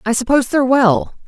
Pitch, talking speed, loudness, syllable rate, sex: 240 Hz, 190 wpm, -15 LUFS, 6.7 syllables/s, female